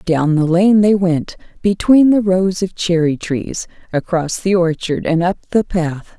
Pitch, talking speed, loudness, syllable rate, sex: 180 Hz, 175 wpm, -15 LUFS, 4.1 syllables/s, female